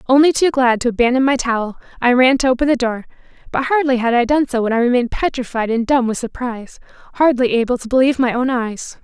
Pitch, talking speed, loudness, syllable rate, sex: 250 Hz, 225 wpm, -16 LUFS, 6.4 syllables/s, female